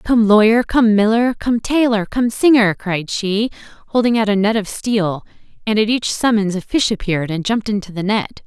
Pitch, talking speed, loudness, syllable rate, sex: 215 Hz, 200 wpm, -16 LUFS, 5.0 syllables/s, female